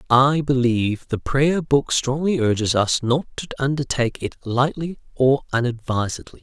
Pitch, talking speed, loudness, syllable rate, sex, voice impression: 130 Hz, 140 wpm, -21 LUFS, 4.7 syllables/s, male, masculine, adult-like, slightly relaxed, slightly dark, raspy, cool, intellectual, calm, slightly mature, wild, kind, modest